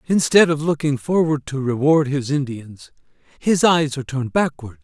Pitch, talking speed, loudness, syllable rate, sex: 140 Hz, 160 wpm, -19 LUFS, 5.0 syllables/s, male